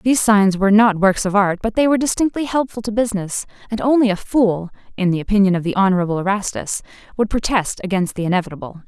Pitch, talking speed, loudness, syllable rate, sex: 205 Hz, 205 wpm, -18 LUFS, 6.6 syllables/s, female